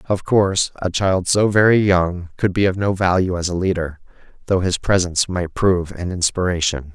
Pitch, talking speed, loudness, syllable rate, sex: 90 Hz, 190 wpm, -18 LUFS, 5.2 syllables/s, male